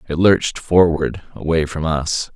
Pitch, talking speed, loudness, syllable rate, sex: 80 Hz, 125 wpm, -18 LUFS, 4.4 syllables/s, male